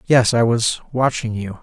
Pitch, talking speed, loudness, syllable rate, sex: 115 Hz, 150 wpm, -18 LUFS, 4.3 syllables/s, male